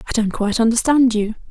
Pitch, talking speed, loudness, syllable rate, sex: 230 Hz, 200 wpm, -17 LUFS, 6.8 syllables/s, female